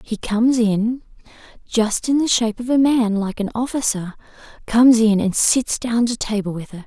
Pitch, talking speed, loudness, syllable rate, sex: 230 Hz, 185 wpm, -18 LUFS, 5.0 syllables/s, female